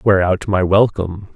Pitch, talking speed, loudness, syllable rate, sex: 95 Hz, 180 wpm, -16 LUFS, 4.7 syllables/s, male